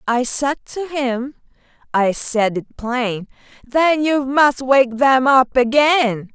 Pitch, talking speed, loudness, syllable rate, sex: 260 Hz, 140 wpm, -17 LUFS, 3.0 syllables/s, female